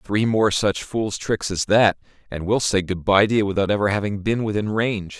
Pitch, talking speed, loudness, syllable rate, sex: 105 Hz, 220 wpm, -21 LUFS, 5.0 syllables/s, male